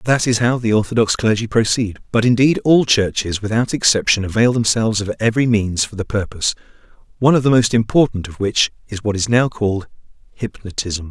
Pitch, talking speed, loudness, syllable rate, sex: 110 Hz, 185 wpm, -17 LUFS, 5.9 syllables/s, male